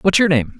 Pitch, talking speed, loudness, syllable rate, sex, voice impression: 165 Hz, 300 wpm, -15 LUFS, 5.7 syllables/s, male, masculine, adult-like, muffled, cool, sincere, very calm, sweet